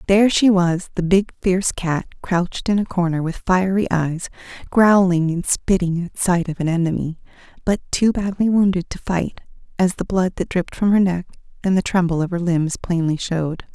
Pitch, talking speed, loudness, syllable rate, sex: 180 Hz, 190 wpm, -19 LUFS, 5.1 syllables/s, female